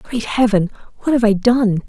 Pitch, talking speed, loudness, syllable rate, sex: 220 Hz, 190 wpm, -16 LUFS, 5.6 syllables/s, female